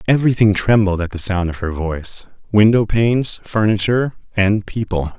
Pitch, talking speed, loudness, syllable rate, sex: 105 Hz, 140 wpm, -17 LUFS, 5.3 syllables/s, male